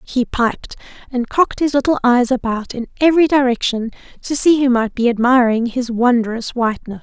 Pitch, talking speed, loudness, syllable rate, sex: 245 Hz, 170 wpm, -16 LUFS, 5.2 syllables/s, female